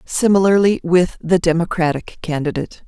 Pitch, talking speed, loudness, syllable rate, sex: 175 Hz, 105 wpm, -17 LUFS, 5.2 syllables/s, female